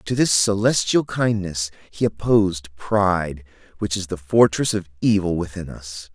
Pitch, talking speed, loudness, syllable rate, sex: 95 Hz, 145 wpm, -21 LUFS, 4.4 syllables/s, male